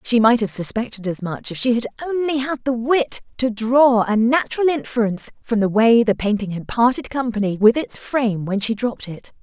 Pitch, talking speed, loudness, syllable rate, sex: 230 Hz, 210 wpm, -19 LUFS, 5.4 syllables/s, female